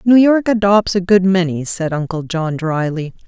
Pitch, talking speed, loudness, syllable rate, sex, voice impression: 185 Hz, 185 wpm, -15 LUFS, 4.6 syllables/s, female, feminine, middle-aged, tensed, slightly powerful, slightly hard, clear, intellectual, calm, reassuring, elegant, slightly strict, slightly sharp